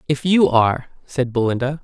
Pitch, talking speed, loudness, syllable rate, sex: 135 Hz, 165 wpm, -18 LUFS, 5.3 syllables/s, male